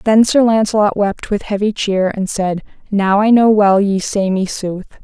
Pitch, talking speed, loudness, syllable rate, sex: 205 Hz, 205 wpm, -15 LUFS, 4.5 syllables/s, female